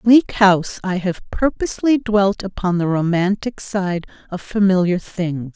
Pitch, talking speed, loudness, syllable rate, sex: 195 Hz, 150 wpm, -18 LUFS, 4.5 syllables/s, female